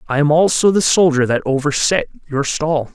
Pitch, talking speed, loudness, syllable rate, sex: 150 Hz, 185 wpm, -15 LUFS, 5.3 syllables/s, male